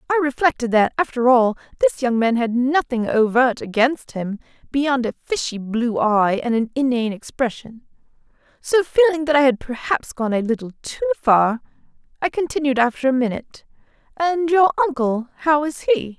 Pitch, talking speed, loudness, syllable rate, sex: 265 Hz, 165 wpm, -19 LUFS, 5.0 syllables/s, female